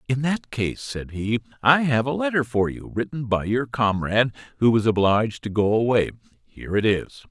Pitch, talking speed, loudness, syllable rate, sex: 115 Hz, 195 wpm, -22 LUFS, 5.2 syllables/s, male